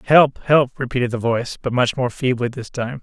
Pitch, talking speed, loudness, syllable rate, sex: 125 Hz, 220 wpm, -19 LUFS, 5.5 syllables/s, male